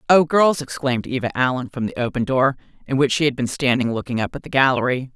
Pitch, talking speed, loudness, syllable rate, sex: 130 Hz, 235 wpm, -20 LUFS, 6.3 syllables/s, female